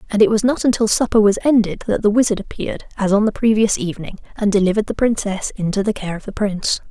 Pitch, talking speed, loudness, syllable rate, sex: 210 Hz, 235 wpm, -18 LUFS, 6.6 syllables/s, female